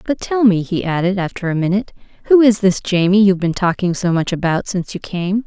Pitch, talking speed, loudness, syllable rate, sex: 190 Hz, 230 wpm, -16 LUFS, 6.0 syllables/s, female